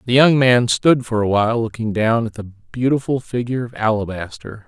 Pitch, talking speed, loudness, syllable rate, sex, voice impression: 115 Hz, 195 wpm, -18 LUFS, 5.3 syllables/s, male, masculine, middle-aged, tensed, powerful, raspy, cool, mature, wild, lively, strict, intense, sharp